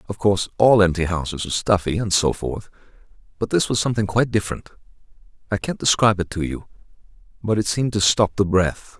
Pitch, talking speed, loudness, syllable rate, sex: 100 Hz, 195 wpm, -20 LUFS, 6.5 syllables/s, male